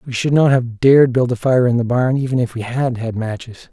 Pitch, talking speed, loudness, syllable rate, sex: 125 Hz, 275 wpm, -16 LUFS, 5.6 syllables/s, male